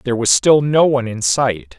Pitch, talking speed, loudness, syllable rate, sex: 120 Hz, 235 wpm, -15 LUFS, 5.4 syllables/s, male